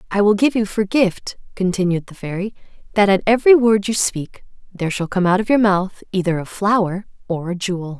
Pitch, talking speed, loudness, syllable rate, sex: 195 Hz, 210 wpm, -18 LUFS, 5.6 syllables/s, female